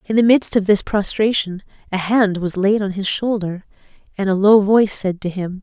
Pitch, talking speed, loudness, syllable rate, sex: 200 Hz, 215 wpm, -17 LUFS, 5.1 syllables/s, female